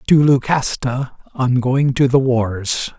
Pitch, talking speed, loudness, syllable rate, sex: 130 Hz, 140 wpm, -17 LUFS, 3.4 syllables/s, male